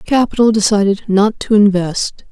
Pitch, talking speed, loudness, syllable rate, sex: 210 Hz, 130 wpm, -13 LUFS, 4.7 syllables/s, female